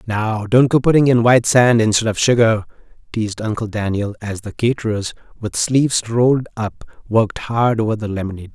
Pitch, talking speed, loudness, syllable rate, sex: 110 Hz, 175 wpm, -17 LUFS, 5.6 syllables/s, male